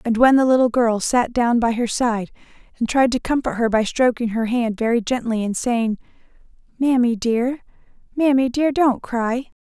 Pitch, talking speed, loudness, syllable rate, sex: 240 Hz, 180 wpm, -19 LUFS, 4.8 syllables/s, female